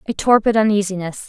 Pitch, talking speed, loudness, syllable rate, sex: 205 Hz, 140 wpm, -17 LUFS, 6.4 syllables/s, female